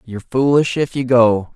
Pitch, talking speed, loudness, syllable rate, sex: 125 Hz, 195 wpm, -16 LUFS, 4.8 syllables/s, male